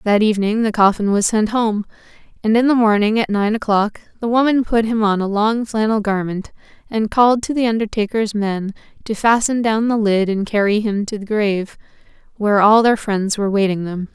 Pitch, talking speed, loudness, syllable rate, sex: 215 Hz, 200 wpm, -17 LUFS, 5.4 syllables/s, female